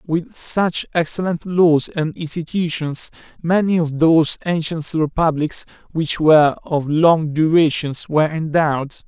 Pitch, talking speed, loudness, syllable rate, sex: 160 Hz, 120 wpm, -18 LUFS, 4.4 syllables/s, male